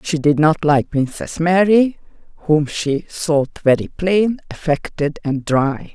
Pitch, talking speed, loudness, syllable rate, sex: 160 Hz, 140 wpm, -17 LUFS, 3.7 syllables/s, female